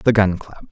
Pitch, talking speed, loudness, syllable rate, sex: 100 Hz, 250 wpm, -18 LUFS, 4.5 syllables/s, male